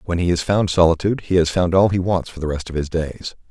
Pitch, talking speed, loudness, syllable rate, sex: 85 Hz, 290 wpm, -19 LUFS, 6.2 syllables/s, male